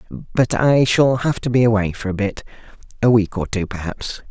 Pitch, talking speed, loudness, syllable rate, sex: 110 Hz, 165 wpm, -18 LUFS, 4.6 syllables/s, male